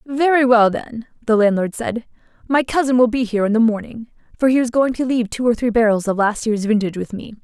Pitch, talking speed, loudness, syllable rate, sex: 230 Hz, 240 wpm, -17 LUFS, 6.1 syllables/s, female